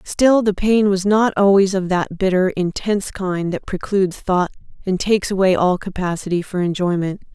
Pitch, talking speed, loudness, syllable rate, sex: 190 Hz, 170 wpm, -18 LUFS, 5.0 syllables/s, female